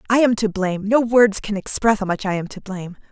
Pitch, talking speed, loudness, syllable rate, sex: 205 Hz, 270 wpm, -19 LUFS, 6.0 syllables/s, female